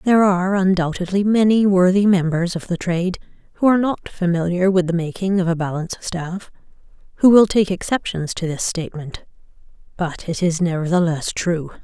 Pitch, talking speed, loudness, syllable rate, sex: 180 Hz, 160 wpm, -19 LUFS, 5.6 syllables/s, female